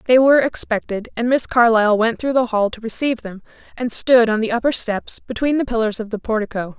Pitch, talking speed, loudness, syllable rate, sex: 230 Hz, 220 wpm, -18 LUFS, 6.0 syllables/s, female